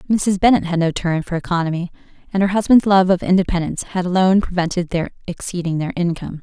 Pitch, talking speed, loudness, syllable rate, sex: 180 Hz, 185 wpm, -18 LUFS, 6.5 syllables/s, female